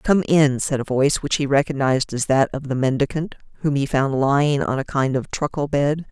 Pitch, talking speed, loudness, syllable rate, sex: 140 Hz, 225 wpm, -20 LUFS, 5.4 syllables/s, female